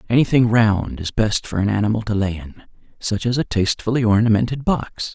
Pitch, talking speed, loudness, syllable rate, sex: 110 Hz, 185 wpm, -19 LUFS, 5.6 syllables/s, male